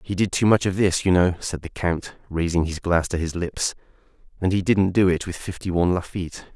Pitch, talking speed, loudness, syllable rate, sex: 90 Hz, 240 wpm, -22 LUFS, 5.5 syllables/s, male